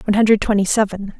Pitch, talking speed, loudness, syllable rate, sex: 205 Hz, 200 wpm, -17 LUFS, 7.8 syllables/s, female